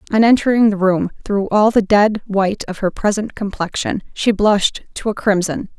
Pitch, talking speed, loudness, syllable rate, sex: 205 Hz, 185 wpm, -17 LUFS, 5.1 syllables/s, female